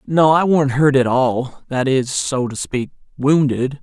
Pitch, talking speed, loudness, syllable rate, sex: 135 Hz, 175 wpm, -17 LUFS, 3.9 syllables/s, male